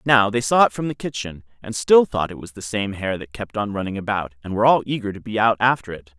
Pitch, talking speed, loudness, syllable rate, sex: 110 Hz, 280 wpm, -21 LUFS, 6.1 syllables/s, male